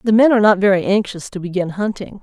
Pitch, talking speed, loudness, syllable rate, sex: 200 Hz, 240 wpm, -16 LUFS, 6.6 syllables/s, female